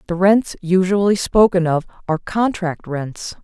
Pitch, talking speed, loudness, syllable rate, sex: 185 Hz, 140 wpm, -18 LUFS, 4.4 syllables/s, female